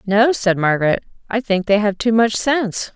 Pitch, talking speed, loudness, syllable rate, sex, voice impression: 210 Hz, 205 wpm, -17 LUFS, 5.1 syllables/s, female, feminine, very adult-like, intellectual, slightly calm